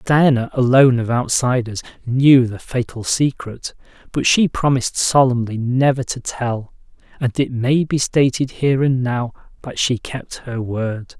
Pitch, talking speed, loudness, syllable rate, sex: 125 Hz, 150 wpm, -18 LUFS, 4.3 syllables/s, male